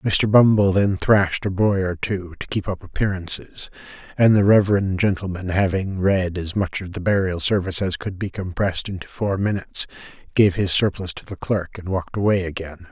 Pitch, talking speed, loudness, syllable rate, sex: 95 Hz, 190 wpm, -21 LUFS, 5.4 syllables/s, male